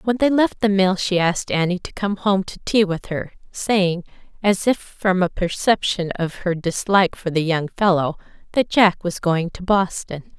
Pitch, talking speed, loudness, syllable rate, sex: 185 Hz, 195 wpm, -20 LUFS, 4.5 syllables/s, female